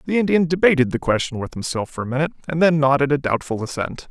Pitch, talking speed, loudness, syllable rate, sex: 145 Hz, 235 wpm, -20 LUFS, 6.9 syllables/s, male